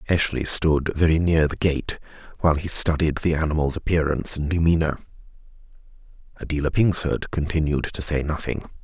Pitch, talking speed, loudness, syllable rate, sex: 80 Hz, 135 wpm, -22 LUFS, 5.6 syllables/s, male